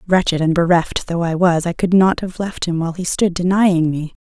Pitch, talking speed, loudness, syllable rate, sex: 175 Hz, 240 wpm, -17 LUFS, 5.2 syllables/s, female